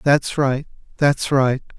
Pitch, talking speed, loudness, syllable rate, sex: 135 Hz, 135 wpm, -19 LUFS, 3.3 syllables/s, male